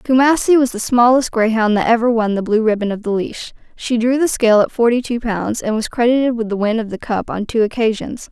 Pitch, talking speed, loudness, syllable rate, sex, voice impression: 230 Hz, 245 wpm, -16 LUFS, 5.7 syllables/s, female, very feminine, young, very thin, very tensed, powerful, very bright, hard, very clear, fluent, very cute, slightly cool, intellectual, very refreshing, very sincere, calm, very friendly, very reassuring, unique, very elegant, slightly wild, sweet, very lively, very strict, sharp, slightly light